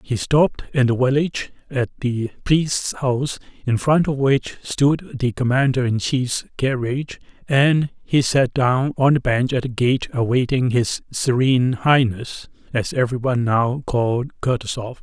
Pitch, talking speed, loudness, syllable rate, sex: 130 Hz, 150 wpm, -20 LUFS, 4.4 syllables/s, male